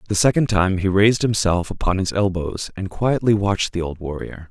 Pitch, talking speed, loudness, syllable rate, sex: 100 Hz, 200 wpm, -20 LUFS, 5.4 syllables/s, male